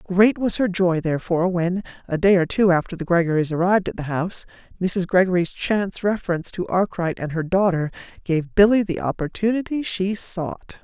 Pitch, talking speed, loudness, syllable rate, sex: 185 Hz, 175 wpm, -21 LUFS, 5.6 syllables/s, female